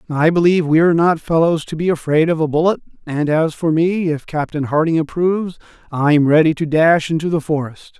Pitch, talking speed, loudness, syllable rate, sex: 160 Hz, 195 wpm, -16 LUFS, 5.4 syllables/s, male